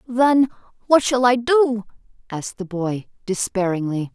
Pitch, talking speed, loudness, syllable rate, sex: 225 Hz, 130 wpm, -20 LUFS, 4.2 syllables/s, female